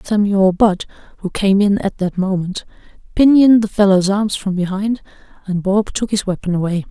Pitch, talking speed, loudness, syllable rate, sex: 200 Hz, 175 wpm, -16 LUFS, 5.1 syllables/s, female